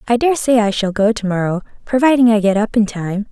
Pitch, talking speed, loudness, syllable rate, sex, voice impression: 220 Hz, 255 wpm, -15 LUFS, 5.9 syllables/s, female, very feminine, slightly young, very thin, tensed, slightly powerful, bright, soft, clear, fluent, cute, very intellectual, refreshing, sincere, very calm, very friendly, reassuring, very unique, very elegant, wild, very sweet, lively, very kind, slightly modest, slightly light